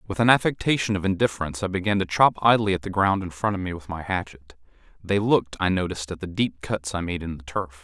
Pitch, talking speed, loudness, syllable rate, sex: 95 Hz, 255 wpm, -24 LUFS, 6.5 syllables/s, male